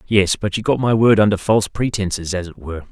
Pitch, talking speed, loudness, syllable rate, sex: 100 Hz, 245 wpm, -17 LUFS, 6.3 syllables/s, male